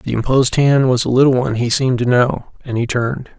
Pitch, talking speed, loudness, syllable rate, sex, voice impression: 125 Hz, 250 wpm, -15 LUFS, 6.1 syllables/s, male, very masculine, middle-aged, very thick, tensed, powerful, slightly dark, slightly soft, clear, fluent, raspy, cool, intellectual, slightly refreshing, sincere, calm, very mature, slightly friendly, slightly reassuring, slightly unique, slightly elegant, wild, slightly sweet, lively, slightly strict, slightly modest